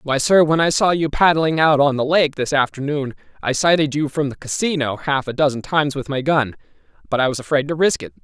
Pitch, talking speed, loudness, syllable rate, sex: 145 Hz, 240 wpm, -18 LUFS, 5.8 syllables/s, male